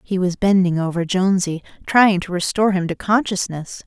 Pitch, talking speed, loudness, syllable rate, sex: 185 Hz, 170 wpm, -18 LUFS, 5.4 syllables/s, female